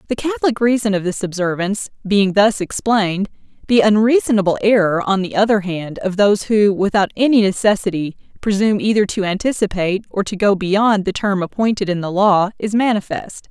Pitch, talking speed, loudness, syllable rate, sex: 205 Hz, 170 wpm, -17 LUFS, 5.6 syllables/s, female